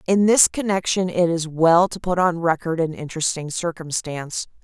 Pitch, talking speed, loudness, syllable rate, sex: 170 Hz, 170 wpm, -20 LUFS, 5.0 syllables/s, female